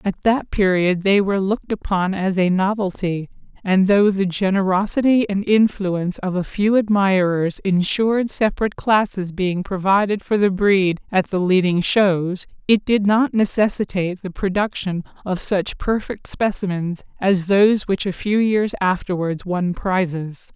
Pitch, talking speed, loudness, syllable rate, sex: 195 Hz, 150 wpm, -19 LUFS, 4.5 syllables/s, female